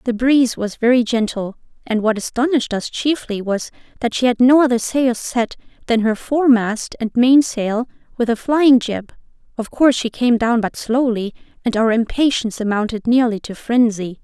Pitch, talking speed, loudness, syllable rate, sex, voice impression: 235 Hz, 170 wpm, -17 LUFS, 5.0 syllables/s, female, very feminine, very young, very thin, tensed, slightly weak, slightly bright, soft, very clear, slightly fluent, very cute, intellectual, refreshing, sincere, calm, very friendly, reassuring, very unique, elegant, slightly wild, sweet, slightly lively, kind, slightly sharp, modest